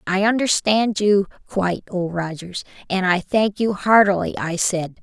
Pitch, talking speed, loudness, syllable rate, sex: 195 Hz, 155 wpm, -20 LUFS, 4.4 syllables/s, female